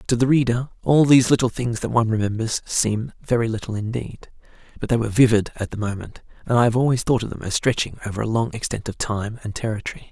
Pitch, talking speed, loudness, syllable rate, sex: 115 Hz, 225 wpm, -21 LUFS, 6.4 syllables/s, male